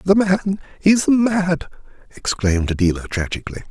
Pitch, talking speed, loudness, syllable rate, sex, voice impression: 160 Hz, 115 wpm, -19 LUFS, 4.9 syllables/s, male, masculine, adult-like, fluent, slightly intellectual, slightly wild, slightly lively